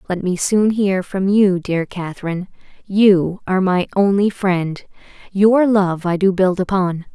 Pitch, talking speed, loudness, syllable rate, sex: 190 Hz, 160 wpm, -17 LUFS, 4.2 syllables/s, female